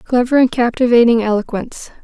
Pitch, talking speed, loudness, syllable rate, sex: 235 Hz, 120 wpm, -14 LUFS, 5.8 syllables/s, female